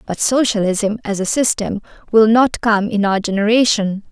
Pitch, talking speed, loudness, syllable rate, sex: 215 Hz, 160 wpm, -16 LUFS, 4.8 syllables/s, female